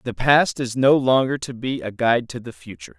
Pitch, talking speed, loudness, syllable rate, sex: 125 Hz, 240 wpm, -19 LUFS, 5.6 syllables/s, male